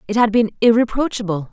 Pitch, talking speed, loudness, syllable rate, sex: 220 Hz, 160 wpm, -17 LUFS, 6.4 syllables/s, female